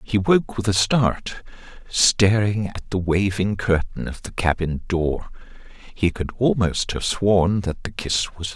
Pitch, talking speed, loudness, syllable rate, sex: 95 Hz, 170 wpm, -21 LUFS, 4.0 syllables/s, male